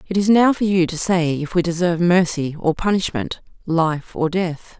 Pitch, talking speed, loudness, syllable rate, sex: 175 Hz, 200 wpm, -19 LUFS, 4.8 syllables/s, female